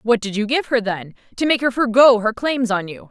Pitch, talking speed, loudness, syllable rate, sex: 230 Hz, 270 wpm, -18 LUFS, 5.6 syllables/s, female